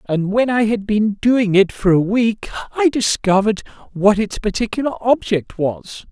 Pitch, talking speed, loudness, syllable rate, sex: 210 Hz, 165 wpm, -17 LUFS, 4.5 syllables/s, male